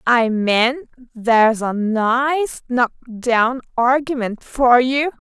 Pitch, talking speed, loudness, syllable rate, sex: 245 Hz, 115 wpm, -17 LUFS, 2.8 syllables/s, female